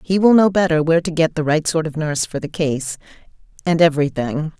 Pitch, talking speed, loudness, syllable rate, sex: 160 Hz, 210 wpm, -18 LUFS, 6.1 syllables/s, female